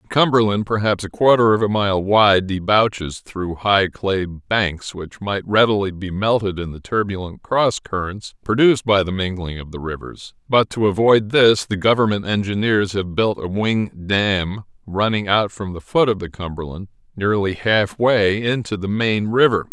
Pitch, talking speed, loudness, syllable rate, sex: 100 Hz, 175 wpm, -19 LUFS, 4.5 syllables/s, male